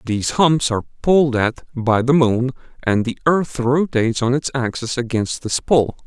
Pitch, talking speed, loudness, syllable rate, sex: 125 Hz, 180 wpm, -18 LUFS, 4.8 syllables/s, male